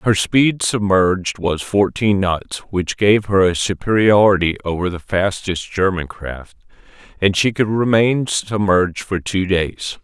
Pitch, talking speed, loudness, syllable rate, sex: 100 Hz, 145 wpm, -17 LUFS, 4.0 syllables/s, male